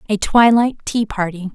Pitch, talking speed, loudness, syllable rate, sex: 210 Hz, 155 wpm, -16 LUFS, 4.6 syllables/s, female